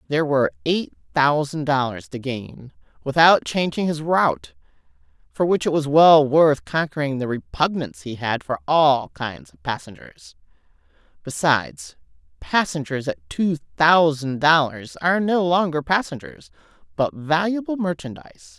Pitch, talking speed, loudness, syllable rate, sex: 155 Hz, 130 wpm, -20 LUFS, 4.6 syllables/s, female